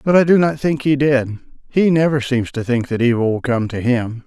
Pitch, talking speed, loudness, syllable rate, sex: 130 Hz, 255 wpm, -17 LUFS, 5.1 syllables/s, male